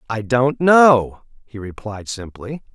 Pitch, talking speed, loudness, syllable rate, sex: 120 Hz, 130 wpm, -15 LUFS, 3.5 syllables/s, male